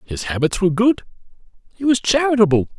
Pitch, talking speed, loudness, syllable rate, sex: 190 Hz, 150 wpm, -18 LUFS, 6.3 syllables/s, male